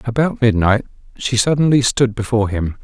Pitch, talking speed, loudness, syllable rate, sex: 115 Hz, 150 wpm, -16 LUFS, 5.5 syllables/s, male